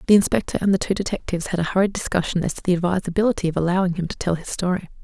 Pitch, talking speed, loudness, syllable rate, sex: 180 Hz, 250 wpm, -22 LUFS, 7.8 syllables/s, female